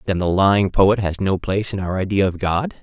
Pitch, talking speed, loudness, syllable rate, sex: 95 Hz, 255 wpm, -19 LUFS, 5.8 syllables/s, male